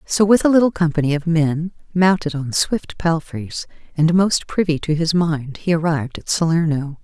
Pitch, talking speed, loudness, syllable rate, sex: 165 Hz, 180 wpm, -18 LUFS, 4.8 syllables/s, female